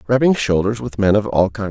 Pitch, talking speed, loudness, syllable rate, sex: 105 Hz, 245 wpm, -17 LUFS, 5.6 syllables/s, male